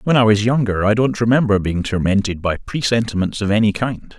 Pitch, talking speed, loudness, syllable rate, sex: 110 Hz, 200 wpm, -17 LUFS, 5.6 syllables/s, male